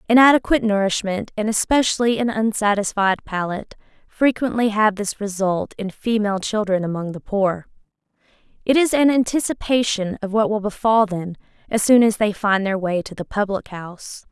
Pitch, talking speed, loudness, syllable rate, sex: 210 Hz, 150 wpm, -20 LUFS, 5.3 syllables/s, female